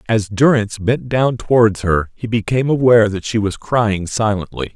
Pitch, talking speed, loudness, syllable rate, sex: 110 Hz, 175 wpm, -16 LUFS, 5.0 syllables/s, male